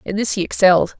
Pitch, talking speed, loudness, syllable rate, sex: 195 Hz, 240 wpm, -16 LUFS, 6.7 syllables/s, female